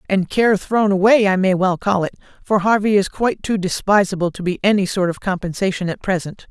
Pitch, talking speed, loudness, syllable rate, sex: 195 Hz, 210 wpm, -18 LUFS, 5.7 syllables/s, female